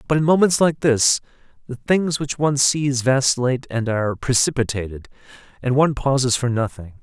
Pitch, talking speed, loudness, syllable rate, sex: 130 Hz, 160 wpm, -19 LUFS, 5.5 syllables/s, male